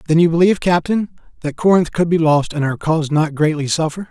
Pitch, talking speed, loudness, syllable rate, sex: 160 Hz, 220 wpm, -16 LUFS, 6.1 syllables/s, male